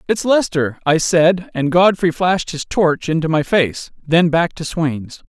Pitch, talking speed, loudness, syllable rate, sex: 165 Hz, 180 wpm, -16 LUFS, 4.1 syllables/s, male